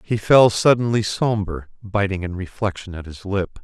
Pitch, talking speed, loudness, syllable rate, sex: 100 Hz, 165 wpm, -19 LUFS, 4.7 syllables/s, male